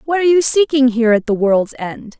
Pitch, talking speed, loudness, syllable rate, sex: 255 Hz, 245 wpm, -14 LUFS, 5.8 syllables/s, female